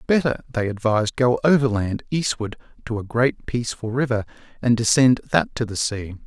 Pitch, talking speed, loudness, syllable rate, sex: 120 Hz, 165 wpm, -21 LUFS, 5.3 syllables/s, male